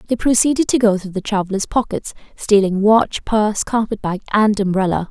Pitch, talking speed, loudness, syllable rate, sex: 210 Hz, 175 wpm, -17 LUFS, 5.4 syllables/s, female